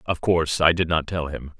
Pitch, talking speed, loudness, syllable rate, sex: 80 Hz, 265 wpm, -22 LUFS, 5.6 syllables/s, male